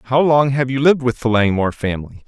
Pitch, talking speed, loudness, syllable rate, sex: 125 Hz, 235 wpm, -16 LUFS, 6.3 syllables/s, male